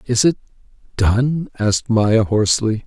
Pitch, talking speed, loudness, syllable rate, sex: 115 Hz, 125 wpm, -17 LUFS, 4.5 syllables/s, male